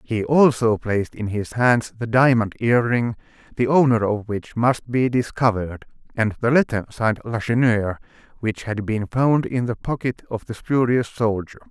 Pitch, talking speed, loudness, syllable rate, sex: 115 Hz, 165 wpm, -21 LUFS, 4.7 syllables/s, male